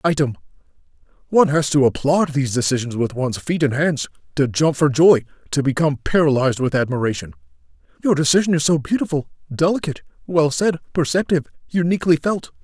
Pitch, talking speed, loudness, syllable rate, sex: 145 Hz, 145 wpm, -19 LUFS, 6.3 syllables/s, male